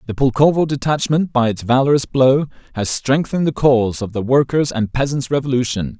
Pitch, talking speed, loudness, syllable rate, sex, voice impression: 130 Hz, 170 wpm, -17 LUFS, 5.6 syllables/s, male, very masculine, very adult-like, middle-aged, very thick, tensed, powerful, bright, soft, very clear, very fluent, very cool, very intellectual, slightly refreshing, very sincere, very calm, very mature, very friendly, very reassuring, very unique, elegant, wild, very sweet, slightly lively, very kind, slightly modest